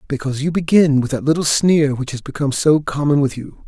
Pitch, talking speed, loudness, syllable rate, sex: 145 Hz, 230 wpm, -17 LUFS, 6.0 syllables/s, male